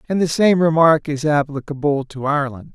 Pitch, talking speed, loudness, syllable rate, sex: 150 Hz, 175 wpm, -18 LUFS, 5.5 syllables/s, male